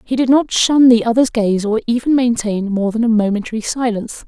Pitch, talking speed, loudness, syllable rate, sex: 230 Hz, 210 wpm, -15 LUFS, 5.6 syllables/s, female